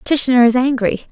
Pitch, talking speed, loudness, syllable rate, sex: 250 Hz, 160 wpm, -14 LUFS, 5.0 syllables/s, female